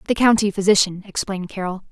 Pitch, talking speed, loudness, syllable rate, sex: 195 Hz, 155 wpm, -19 LUFS, 6.6 syllables/s, female